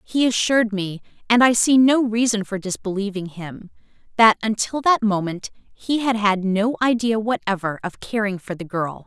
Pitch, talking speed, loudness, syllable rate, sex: 210 Hz, 160 wpm, -20 LUFS, 4.9 syllables/s, female